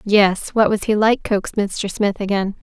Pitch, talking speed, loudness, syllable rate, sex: 205 Hz, 200 wpm, -18 LUFS, 4.8 syllables/s, female